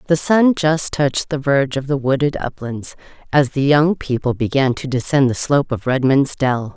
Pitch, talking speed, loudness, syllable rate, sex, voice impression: 140 Hz, 195 wpm, -17 LUFS, 5.0 syllables/s, female, feminine, middle-aged, tensed, powerful, slightly soft, slightly muffled, slightly raspy, intellectual, calm, reassuring, elegant, lively, slightly strict, slightly sharp